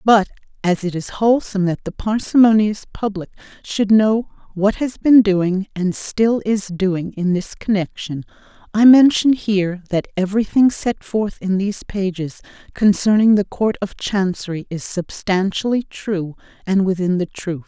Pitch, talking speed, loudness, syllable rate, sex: 200 Hz, 150 wpm, -18 LUFS, 4.5 syllables/s, female